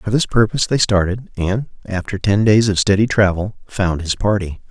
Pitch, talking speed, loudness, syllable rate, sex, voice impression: 100 Hz, 190 wpm, -17 LUFS, 5.1 syllables/s, male, masculine, adult-like, slightly thick, fluent, cool, sincere, slightly calm, slightly kind